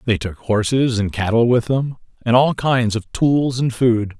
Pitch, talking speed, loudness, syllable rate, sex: 120 Hz, 200 wpm, -18 LUFS, 4.2 syllables/s, male